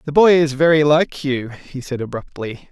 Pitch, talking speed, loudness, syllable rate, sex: 145 Hz, 200 wpm, -17 LUFS, 4.9 syllables/s, male